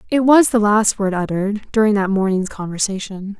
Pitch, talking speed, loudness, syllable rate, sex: 205 Hz, 175 wpm, -17 LUFS, 5.3 syllables/s, female